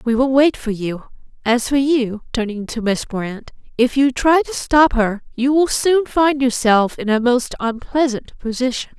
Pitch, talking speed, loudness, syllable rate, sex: 250 Hz, 185 wpm, -18 LUFS, 4.3 syllables/s, female